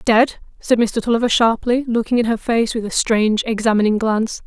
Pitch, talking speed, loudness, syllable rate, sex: 225 Hz, 190 wpm, -17 LUFS, 5.6 syllables/s, female